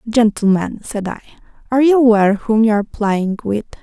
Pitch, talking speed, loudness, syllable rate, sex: 220 Hz, 170 wpm, -15 LUFS, 5.8 syllables/s, female